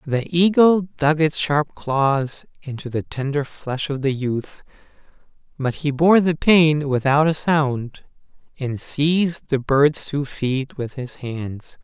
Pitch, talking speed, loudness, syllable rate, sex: 145 Hz, 150 wpm, -20 LUFS, 3.5 syllables/s, male